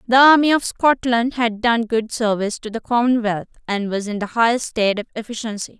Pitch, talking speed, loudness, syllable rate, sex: 230 Hz, 195 wpm, -19 LUFS, 5.6 syllables/s, female